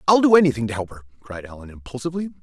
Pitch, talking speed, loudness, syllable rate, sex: 135 Hz, 220 wpm, -19 LUFS, 8.0 syllables/s, male